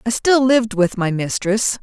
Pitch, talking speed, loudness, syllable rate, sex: 215 Hz, 195 wpm, -17 LUFS, 4.7 syllables/s, female